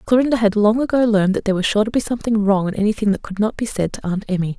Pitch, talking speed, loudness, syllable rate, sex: 210 Hz, 300 wpm, -18 LUFS, 7.5 syllables/s, female